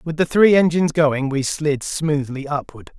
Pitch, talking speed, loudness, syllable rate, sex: 150 Hz, 180 wpm, -18 LUFS, 4.5 syllables/s, male